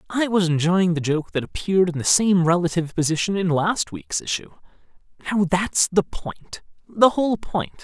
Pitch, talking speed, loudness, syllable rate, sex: 175 Hz, 170 wpm, -21 LUFS, 5.1 syllables/s, male